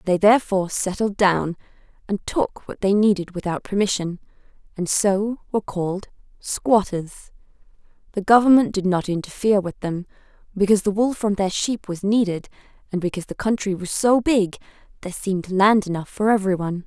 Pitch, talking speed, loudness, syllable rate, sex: 200 Hz, 155 wpm, -21 LUFS, 5.6 syllables/s, female